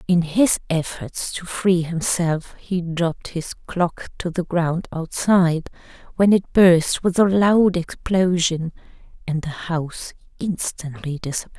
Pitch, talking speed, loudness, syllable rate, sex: 170 Hz, 135 wpm, -21 LUFS, 4.1 syllables/s, female